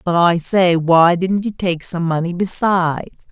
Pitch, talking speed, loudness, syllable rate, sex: 175 Hz, 180 wpm, -16 LUFS, 4.3 syllables/s, female